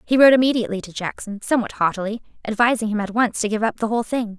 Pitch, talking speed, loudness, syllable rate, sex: 220 Hz, 235 wpm, -20 LUFS, 7.4 syllables/s, female